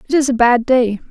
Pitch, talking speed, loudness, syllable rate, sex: 250 Hz, 270 wpm, -14 LUFS, 5.9 syllables/s, female